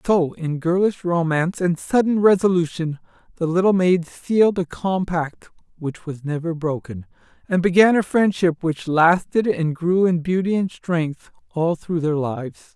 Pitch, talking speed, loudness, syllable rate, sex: 170 Hz, 155 wpm, -20 LUFS, 4.5 syllables/s, male